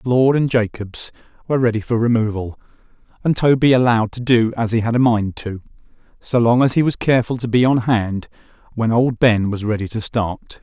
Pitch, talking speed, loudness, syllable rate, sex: 115 Hz, 200 wpm, -18 LUFS, 5.4 syllables/s, male